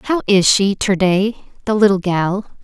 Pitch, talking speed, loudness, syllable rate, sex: 200 Hz, 160 wpm, -15 LUFS, 4.2 syllables/s, female